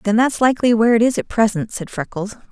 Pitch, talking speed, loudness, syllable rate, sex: 220 Hz, 240 wpm, -17 LUFS, 6.6 syllables/s, female